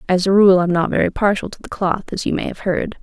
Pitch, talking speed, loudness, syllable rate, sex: 190 Hz, 300 wpm, -17 LUFS, 6.1 syllables/s, female